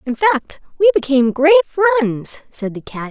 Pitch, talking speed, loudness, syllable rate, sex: 295 Hz, 175 wpm, -15 LUFS, 4.4 syllables/s, female